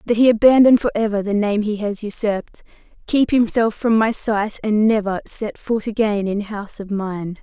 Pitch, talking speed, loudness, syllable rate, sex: 215 Hz, 195 wpm, -18 LUFS, 4.9 syllables/s, female